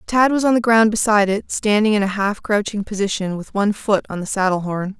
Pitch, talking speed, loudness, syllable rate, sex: 205 Hz, 240 wpm, -18 LUFS, 5.8 syllables/s, female